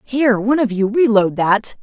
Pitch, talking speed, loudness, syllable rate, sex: 225 Hz, 200 wpm, -16 LUFS, 5.3 syllables/s, female